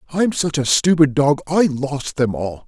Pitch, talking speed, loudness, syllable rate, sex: 145 Hz, 200 wpm, -18 LUFS, 4.3 syllables/s, male